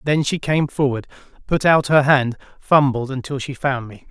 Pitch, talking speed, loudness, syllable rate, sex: 135 Hz, 190 wpm, -19 LUFS, 4.8 syllables/s, male